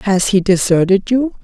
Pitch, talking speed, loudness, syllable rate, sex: 200 Hz, 165 wpm, -14 LUFS, 4.4 syllables/s, female